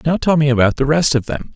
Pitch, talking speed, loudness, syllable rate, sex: 140 Hz, 310 wpm, -15 LUFS, 6.3 syllables/s, male